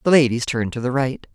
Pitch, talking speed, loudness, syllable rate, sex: 130 Hz, 270 wpm, -20 LUFS, 6.6 syllables/s, female